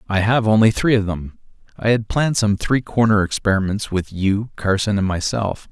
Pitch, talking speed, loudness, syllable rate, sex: 105 Hz, 190 wpm, -19 LUFS, 5.3 syllables/s, male